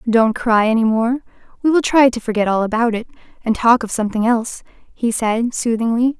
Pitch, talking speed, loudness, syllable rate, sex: 230 Hz, 195 wpm, -17 LUFS, 5.4 syllables/s, female